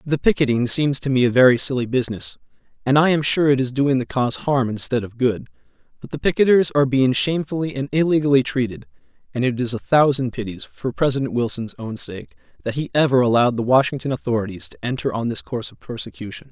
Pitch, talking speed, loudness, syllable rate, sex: 130 Hz, 205 wpm, -20 LUFS, 6.4 syllables/s, male